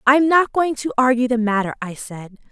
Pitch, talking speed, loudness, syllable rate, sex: 245 Hz, 240 wpm, -18 LUFS, 5.5 syllables/s, female